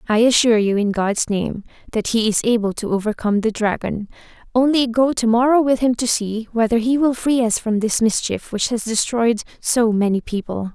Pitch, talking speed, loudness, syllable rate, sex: 225 Hz, 200 wpm, -18 LUFS, 5.3 syllables/s, female